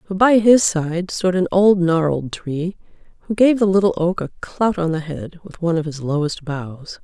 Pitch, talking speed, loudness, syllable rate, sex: 175 Hz, 215 wpm, -18 LUFS, 4.7 syllables/s, female